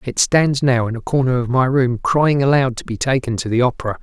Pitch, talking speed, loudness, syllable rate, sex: 130 Hz, 255 wpm, -17 LUFS, 5.6 syllables/s, male